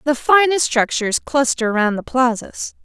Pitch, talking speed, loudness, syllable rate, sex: 260 Hz, 150 wpm, -17 LUFS, 4.9 syllables/s, female